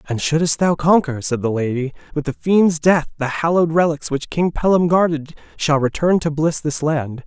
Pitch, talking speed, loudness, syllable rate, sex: 155 Hz, 200 wpm, -18 LUFS, 4.9 syllables/s, male